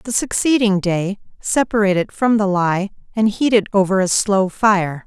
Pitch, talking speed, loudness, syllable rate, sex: 200 Hz, 180 wpm, -17 LUFS, 4.8 syllables/s, female